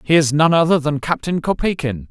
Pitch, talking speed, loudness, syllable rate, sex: 155 Hz, 200 wpm, -17 LUFS, 5.5 syllables/s, male